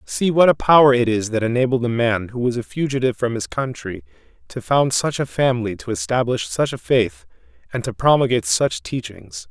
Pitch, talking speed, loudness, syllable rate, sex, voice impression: 125 Hz, 200 wpm, -19 LUFS, 5.5 syllables/s, male, masculine, slightly young, slightly adult-like, slightly thick, tensed, slightly powerful, very bright, slightly soft, clear, slightly fluent, cool, intellectual, very refreshing, sincere, slightly calm, slightly mature, very friendly, reassuring, slightly unique, wild, slightly sweet, very lively, kind, slightly intense